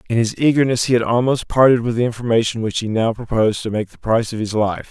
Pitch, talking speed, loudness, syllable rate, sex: 115 Hz, 255 wpm, -18 LUFS, 6.6 syllables/s, male